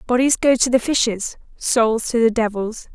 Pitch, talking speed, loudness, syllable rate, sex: 235 Hz, 185 wpm, -18 LUFS, 4.6 syllables/s, female